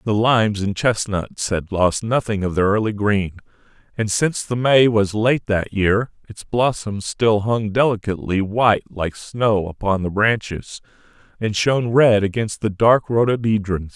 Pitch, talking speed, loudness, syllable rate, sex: 105 Hz, 160 wpm, -19 LUFS, 4.4 syllables/s, male